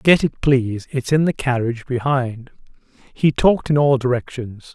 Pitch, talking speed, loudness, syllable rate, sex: 130 Hz, 165 wpm, -19 LUFS, 4.9 syllables/s, male